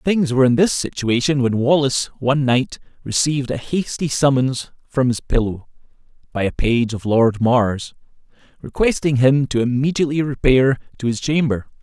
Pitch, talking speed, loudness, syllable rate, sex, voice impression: 130 Hz, 150 wpm, -18 LUFS, 5.0 syllables/s, male, very masculine, slightly middle-aged, thick, very tensed, powerful, bright, hard, clear, fluent, slightly raspy, cool, intellectual, slightly refreshing, sincere, calm, mature, friendly, reassuring, slightly unique, slightly elegant, wild, slightly sweet, lively, kind, slightly modest